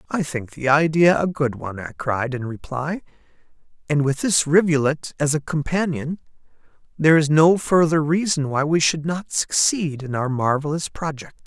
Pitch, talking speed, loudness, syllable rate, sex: 150 Hz, 165 wpm, -20 LUFS, 4.9 syllables/s, male